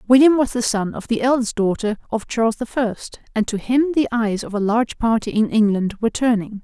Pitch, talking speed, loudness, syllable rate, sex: 230 Hz, 225 wpm, -19 LUFS, 5.5 syllables/s, female